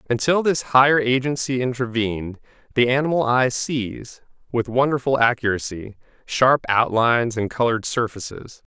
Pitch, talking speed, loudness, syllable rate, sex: 125 Hz, 115 wpm, -20 LUFS, 4.9 syllables/s, male